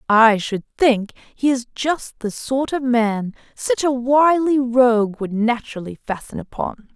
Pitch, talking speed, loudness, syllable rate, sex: 240 Hz, 155 wpm, -19 LUFS, 3.8 syllables/s, female